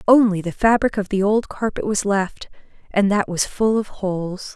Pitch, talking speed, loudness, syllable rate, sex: 200 Hz, 185 wpm, -20 LUFS, 4.8 syllables/s, female